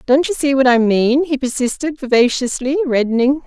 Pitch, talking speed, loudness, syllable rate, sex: 265 Hz, 175 wpm, -16 LUFS, 5.3 syllables/s, female